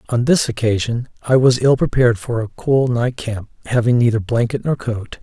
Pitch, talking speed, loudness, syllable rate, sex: 120 Hz, 195 wpm, -17 LUFS, 5.1 syllables/s, male